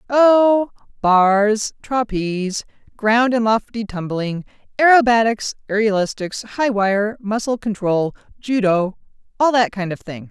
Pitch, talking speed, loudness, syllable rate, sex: 215 Hz, 105 wpm, -18 LUFS, 3.9 syllables/s, female